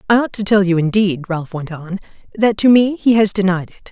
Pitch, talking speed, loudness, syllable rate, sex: 195 Hz, 245 wpm, -15 LUFS, 5.6 syllables/s, female